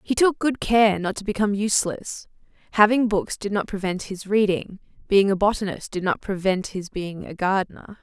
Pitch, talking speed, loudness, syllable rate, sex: 200 Hz, 185 wpm, -22 LUFS, 5.2 syllables/s, female